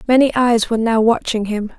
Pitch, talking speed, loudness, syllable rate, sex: 230 Hz, 200 wpm, -16 LUFS, 5.6 syllables/s, female